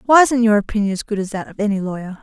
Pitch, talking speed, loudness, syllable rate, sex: 210 Hz, 295 wpm, -18 LUFS, 7.2 syllables/s, female